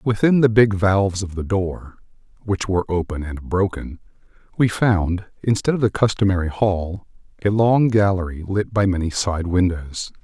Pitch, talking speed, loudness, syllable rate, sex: 95 Hz, 145 wpm, -20 LUFS, 4.7 syllables/s, male